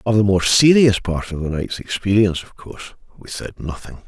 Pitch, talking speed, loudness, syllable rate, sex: 100 Hz, 205 wpm, -17 LUFS, 5.7 syllables/s, male